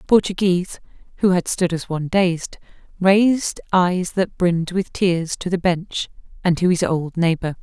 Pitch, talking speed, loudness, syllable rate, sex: 180 Hz, 165 wpm, -20 LUFS, 4.6 syllables/s, female